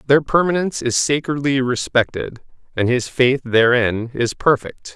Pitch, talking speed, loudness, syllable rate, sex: 130 Hz, 135 wpm, -18 LUFS, 4.5 syllables/s, male